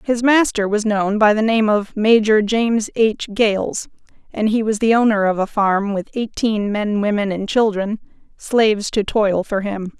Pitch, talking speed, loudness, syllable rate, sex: 215 Hz, 185 wpm, -17 LUFS, 4.4 syllables/s, female